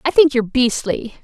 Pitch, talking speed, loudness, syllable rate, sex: 260 Hz, 195 wpm, -17 LUFS, 5.6 syllables/s, female